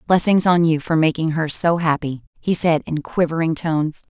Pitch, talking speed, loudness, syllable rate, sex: 165 Hz, 190 wpm, -19 LUFS, 5.1 syllables/s, female